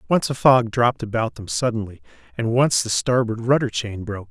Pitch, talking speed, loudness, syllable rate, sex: 115 Hz, 195 wpm, -20 LUFS, 5.6 syllables/s, male